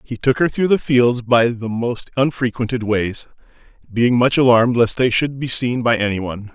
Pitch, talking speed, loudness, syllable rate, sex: 120 Hz, 195 wpm, -17 LUFS, 4.8 syllables/s, male